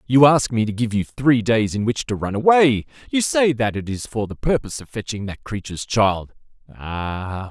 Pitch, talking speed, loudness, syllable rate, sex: 115 Hz, 215 wpm, -20 LUFS, 4.9 syllables/s, male